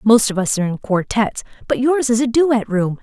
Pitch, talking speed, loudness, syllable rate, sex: 225 Hz, 240 wpm, -17 LUFS, 5.6 syllables/s, female